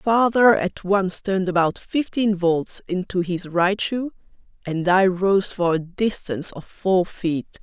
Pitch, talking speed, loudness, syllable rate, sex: 190 Hz, 155 wpm, -21 LUFS, 4.0 syllables/s, female